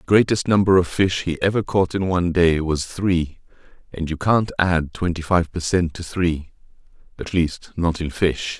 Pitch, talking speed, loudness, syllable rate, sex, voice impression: 85 Hz, 190 wpm, -20 LUFS, 4.6 syllables/s, male, very masculine, very adult-like, slightly thick, cool, slightly refreshing, sincere